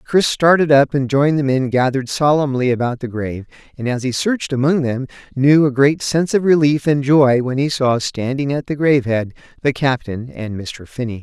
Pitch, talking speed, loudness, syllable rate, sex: 135 Hz, 210 wpm, -17 LUFS, 5.4 syllables/s, male